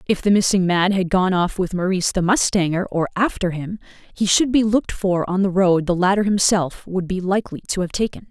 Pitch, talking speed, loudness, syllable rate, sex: 190 Hz, 225 wpm, -19 LUFS, 5.6 syllables/s, female